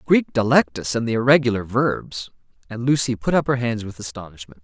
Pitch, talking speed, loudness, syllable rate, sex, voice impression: 120 Hz, 180 wpm, -20 LUFS, 5.6 syllables/s, male, masculine, adult-like, tensed, fluent, intellectual, refreshing, calm, slightly elegant